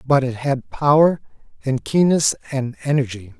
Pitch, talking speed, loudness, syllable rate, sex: 135 Hz, 140 wpm, -19 LUFS, 4.7 syllables/s, male